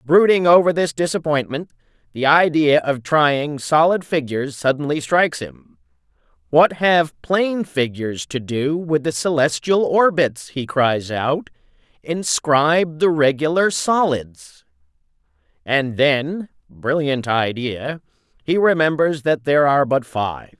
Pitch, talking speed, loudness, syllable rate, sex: 150 Hz, 115 wpm, -18 LUFS, 4.1 syllables/s, male